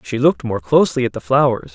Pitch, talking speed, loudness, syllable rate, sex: 120 Hz, 240 wpm, -17 LUFS, 6.7 syllables/s, male